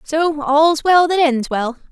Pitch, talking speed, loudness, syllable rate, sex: 300 Hz, 190 wpm, -15 LUFS, 3.6 syllables/s, female